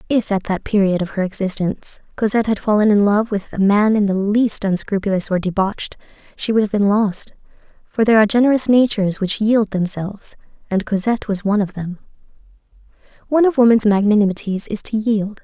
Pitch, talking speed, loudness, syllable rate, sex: 210 Hz, 185 wpm, -17 LUFS, 6.0 syllables/s, female